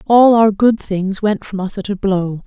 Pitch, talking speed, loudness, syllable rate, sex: 205 Hz, 245 wpm, -15 LUFS, 4.3 syllables/s, female